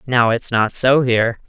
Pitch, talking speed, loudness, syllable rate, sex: 125 Hz, 205 wpm, -16 LUFS, 4.7 syllables/s, female